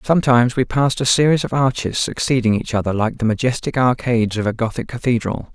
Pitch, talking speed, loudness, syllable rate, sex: 120 Hz, 195 wpm, -18 LUFS, 6.2 syllables/s, male